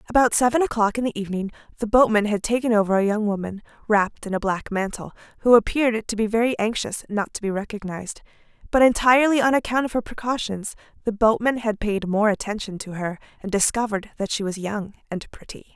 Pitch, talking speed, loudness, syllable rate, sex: 215 Hz, 200 wpm, -22 LUFS, 6.3 syllables/s, female